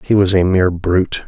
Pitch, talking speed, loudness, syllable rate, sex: 95 Hz, 235 wpm, -14 LUFS, 6.0 syllables/s, male